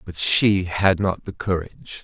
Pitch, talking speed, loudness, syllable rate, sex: 95 Hz, 175 wpm, -20 LUFS, 4.2 syllables/s, male